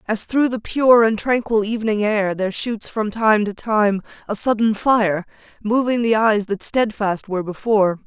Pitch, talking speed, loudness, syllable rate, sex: 215 Hz, 180 wpm, -19 LUFS, 4.7 syllables/s, female